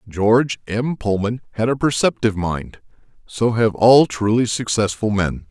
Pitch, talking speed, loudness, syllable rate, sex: 110 Hz, 130 wpm, -18 LUFS, 4.5 syllables/s, male